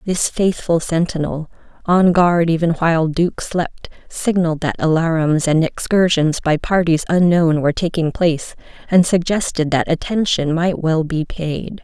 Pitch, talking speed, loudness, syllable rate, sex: 165 Hz, 140 wpm, -17 LUFS, 4.5 syllables/s, female